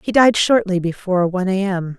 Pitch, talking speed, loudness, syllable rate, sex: 190 Hz, 210 wpm, -17 LUFS, 5.8 syllables/s, female